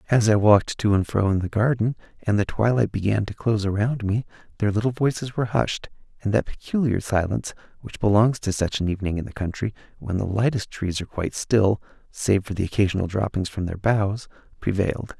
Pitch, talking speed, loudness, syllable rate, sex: 105 Hz, 200 wpm, -23 LUFS, 6.0 syllables/s, male